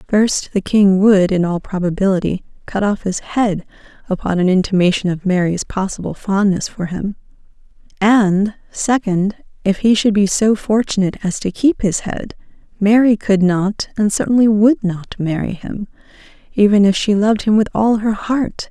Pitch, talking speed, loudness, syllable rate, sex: 200 Hz, 165 wpm, -16 LUFS, 4.7 syllables/s, female